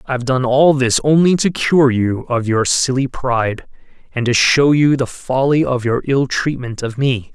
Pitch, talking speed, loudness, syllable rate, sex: 130 Hz, 205 wpm, -15 LUFS, 4.5 syllables/s, male